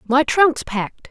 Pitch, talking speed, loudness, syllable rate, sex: 270 Hz, 165 wpm, -18 LUFS, 4.0 syllables/s, female